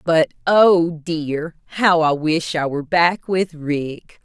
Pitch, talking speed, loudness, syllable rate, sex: 165 Hz, 155 wpm, -18 LUFS, 3.3 syllables/s, female